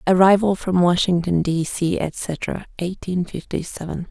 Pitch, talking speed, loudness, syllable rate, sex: 175 Hz, 130 wpm, -21 LUFS, 4.1 syllables/s, female